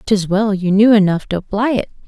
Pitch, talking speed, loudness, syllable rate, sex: 205 Hz, 230 wpm, -15 LUFS, 5.5 syllables/s, female